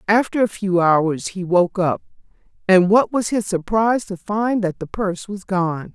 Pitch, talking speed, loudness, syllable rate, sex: 195 Hz, 190 wpm, -19 LUFS, 4.5 syllables/s, female